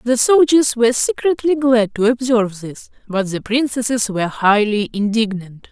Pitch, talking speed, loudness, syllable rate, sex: 230 Hz, 145 wpm, -16 LUFS, 4.8 syllables/s, female